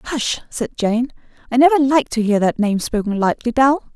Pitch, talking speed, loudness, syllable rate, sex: 240 Hz, 195 wpm, -17 LUFS, 5.1 syllables/s, female